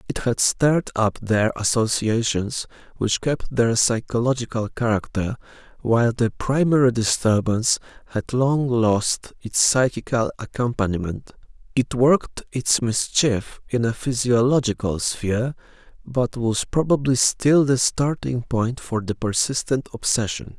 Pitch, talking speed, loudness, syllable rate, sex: 120 Hz, 115 wpm, -21 LUFS, 4.3 syllables/s, male